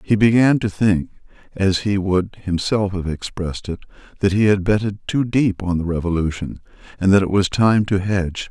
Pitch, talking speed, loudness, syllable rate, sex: 95 Hz, 190 wpm, -19 LUFS, 5.1 syllables/s, male